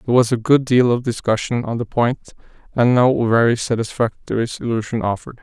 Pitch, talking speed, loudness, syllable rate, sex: 120 Hz, 175 wpm, -18 LUFS, 5.8 syllables/s, male